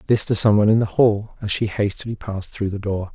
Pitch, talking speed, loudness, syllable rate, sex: 105 Hz, 265 wpm, -20 LUFS, 6.2 syllables/s, male